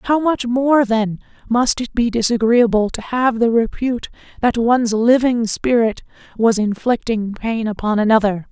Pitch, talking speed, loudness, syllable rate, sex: 230 Hz, 150 wpm, -17 LUFS, 4.5 syllables/s, female